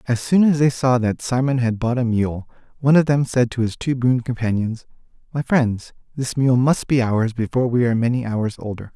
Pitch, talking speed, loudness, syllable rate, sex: 125 Hz, 220 wpm, -19 LUFS, 5.4 syllables/s, male